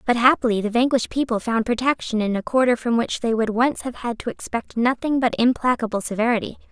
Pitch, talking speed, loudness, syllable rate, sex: 235 Hz, 205 wpm, -21 LUFS, 6.1 syllables/s, female